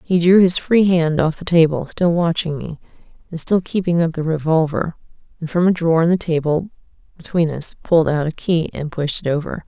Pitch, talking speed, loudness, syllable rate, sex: 165 Hz, 210 wpm, -18 LUFS, 5.4 syllables/s, female